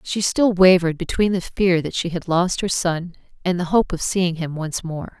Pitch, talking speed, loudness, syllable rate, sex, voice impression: 175 Hz, 230 wpm, -20 LUFS, 4.8 syllables/s, female, feminine, middle-aged, tensed, powerful, slightly hard, clear, fluent, intellectual, calm, elegant, lively, slightly sharp